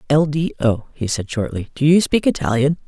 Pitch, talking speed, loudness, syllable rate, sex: 140 Hz, 210 wpm, -19 LUFS, 5.4 syllables/s, female